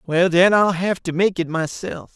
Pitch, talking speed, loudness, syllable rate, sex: 175 Hz, 220 wpm, -19 LUFS, 4.5 syllables/s, male